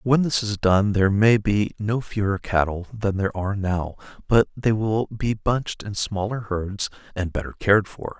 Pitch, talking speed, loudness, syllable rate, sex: 105 Hz, 190 wpm, -23 LUFS, 4.7 syllables/s, male